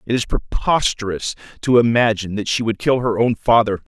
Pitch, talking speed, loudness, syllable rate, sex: 115 Hz, 185 wpm, -18 LUFS, 5.5 syllables/s, male